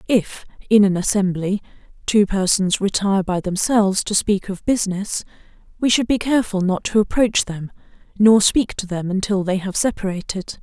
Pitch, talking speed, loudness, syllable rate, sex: 200 Hz, 165 wpm, -19 LUFS, 5.2 syllables/s, female